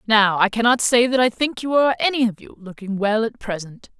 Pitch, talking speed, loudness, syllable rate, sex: 225 Hz, 240 wpm, -19 LUFS, 5.7 syllables/s, female